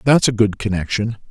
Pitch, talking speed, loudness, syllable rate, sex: 110 Hz, 185 wpm, -18 LUFS, 5.5 syllables/s, male